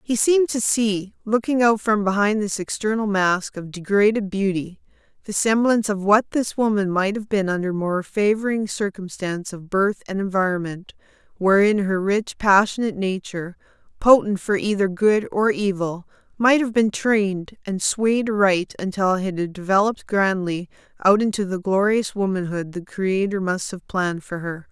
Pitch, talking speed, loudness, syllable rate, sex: 200 Hz, 160 wpm, -21 LUFS, 4.8 syllables/s, female